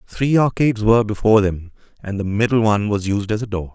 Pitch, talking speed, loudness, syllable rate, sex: 105 Hz, 225 wpm, -18 LUFS, 6.3 syllables/s, male